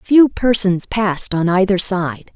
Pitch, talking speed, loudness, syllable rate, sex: 195 Hz, 155 wpm, -16 LUFS, 3.9 syllables/s, female